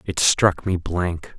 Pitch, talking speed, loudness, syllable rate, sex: 90 Hz, 175 wpm, -21 LUFS, 3.2 syllables/s, male